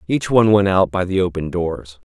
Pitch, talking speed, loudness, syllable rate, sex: 95 Hz, 225 wpm, -17 LUFS, 5.4 syllables/s, male